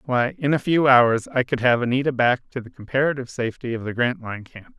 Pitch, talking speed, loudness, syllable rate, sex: 130 Hz, 225 wpm, -21 LUFS, 6.1 syllables/s, male